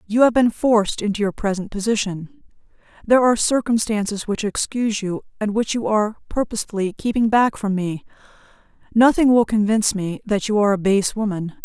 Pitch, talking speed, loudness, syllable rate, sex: 210 Hz, 170 wpm, -20 LUFS, 5.7 syllables/s, female